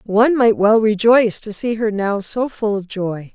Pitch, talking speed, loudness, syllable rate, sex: 210 Hz, 215 wpm, -17 LUFS, 4.6 syllables/s, female